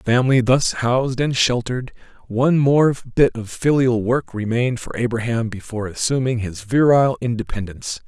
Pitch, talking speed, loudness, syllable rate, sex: 120 Hz, 150 wpm, -19 LUFS, 5.6 syllables/s, male